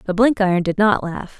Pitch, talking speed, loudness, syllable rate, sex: 200 Hz, 215 wpm, -18 LUFS, 5.6 syllables/s, female